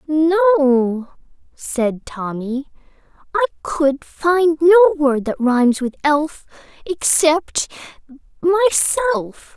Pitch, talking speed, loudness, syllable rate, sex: 305 Hz, 90 wpm, -17 LUFS, 3.1 syllables/s, female